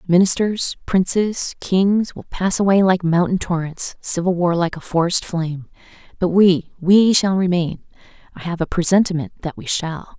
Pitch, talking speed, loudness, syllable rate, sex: 180 Hz, 155 wpm, -18 LUFS, 4.6 syllables/s, female